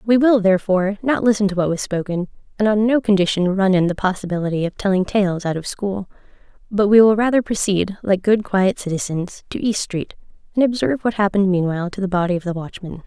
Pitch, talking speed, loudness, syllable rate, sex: 195 Hz, 210 wpm, -19 LUFS, 6.1 syllables/s, female